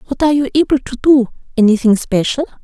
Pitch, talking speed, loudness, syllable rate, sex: 255 Hz, 180 wpm, -14 LUFS, 6.7 syllables/s, female